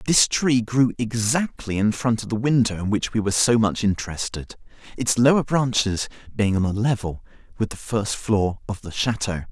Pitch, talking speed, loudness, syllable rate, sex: 110 Hz, 190 wpm, -22 LUFS, 5.0 syllables/s, male